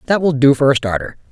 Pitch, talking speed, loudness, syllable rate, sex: 130 Hz, 275 wpm, -15 LUFS, 6.9 syllables/s, male